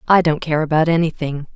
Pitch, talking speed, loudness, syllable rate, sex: 155 Hz, 195 wpm, -18 LUFS, 6.0 syllables/s, female